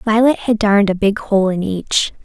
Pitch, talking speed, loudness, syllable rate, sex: 205 Hz, 215 wpm, -15 LUFS, 4.9 syllables/s, female